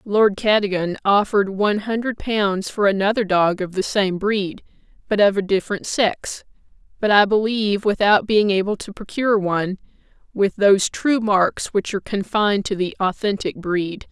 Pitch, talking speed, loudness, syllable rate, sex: 200 Hz, 160 wpm, -19 LUFS, 4.9 syllables/s, female